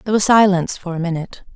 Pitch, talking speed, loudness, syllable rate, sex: 185 Hz, 230 wpm, -16 LUFS, 8.3 syllables/s, female